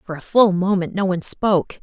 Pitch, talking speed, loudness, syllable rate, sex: 190 Hz, 230 wpm, -19 LUFS, 5.9 syllables/s, female